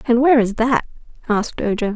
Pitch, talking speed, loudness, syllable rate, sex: 230 Hz, 185 wpm, -18 LUFS, 6.4 syllables/s, female